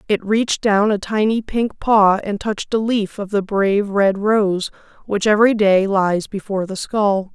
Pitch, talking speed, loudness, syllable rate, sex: 205 Hz, 190 wpm, -18 LUFS, 4.6 syllables/s, female